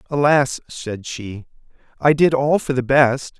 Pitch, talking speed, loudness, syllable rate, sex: 135 Hz, 160 wpm, -18 LUFS, 4.0 syllables/s, male